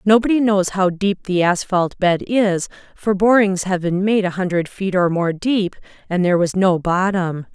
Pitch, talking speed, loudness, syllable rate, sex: 190 Hz, 190 wpm, -18 LUFS, 4.6 syllables/s, female